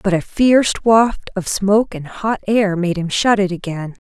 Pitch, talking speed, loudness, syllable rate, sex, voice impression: 195 Hz, 205 wpm, -17 LUFS, 4.6 syllables/s, female, very feminine, slightly young, slightly adult-like, slightly tensed, slightly weak, slightly dark, slightly hard, slightly clear, fluent, slightly cool, intellectual, refreshing, sincere, very calm, friendly, reassuring, slightly unique, slightly elegant, sweet, slightly lively, strict, slightly sharp